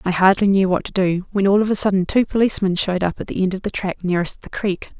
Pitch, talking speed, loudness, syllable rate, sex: 190 Hz, 290 wpm, -19 LUFS, 6.7 syllables/s, female